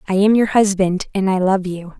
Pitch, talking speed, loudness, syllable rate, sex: 195 Hz, 240 wpm, -16 LUFS, 5.2 syllables/s, female